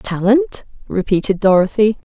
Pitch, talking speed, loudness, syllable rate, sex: 210 Hz, 85 wpm, -16 LUFS, 4.6 syllables/s, female